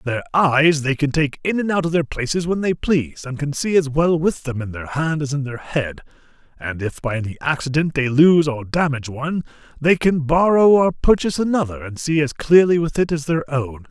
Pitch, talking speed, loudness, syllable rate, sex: 150 Hz, 230 wpm, -19 LUFS, 5.3 syllables/s, male